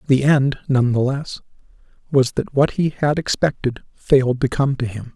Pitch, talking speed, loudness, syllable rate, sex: 135 Hz, 185 wpm, -19 LUFS, 4.7 syllables/s, male